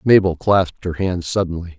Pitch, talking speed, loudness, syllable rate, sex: 90 Hz, 170 wpm, -19 LUFS, 5.4 syllables/s, male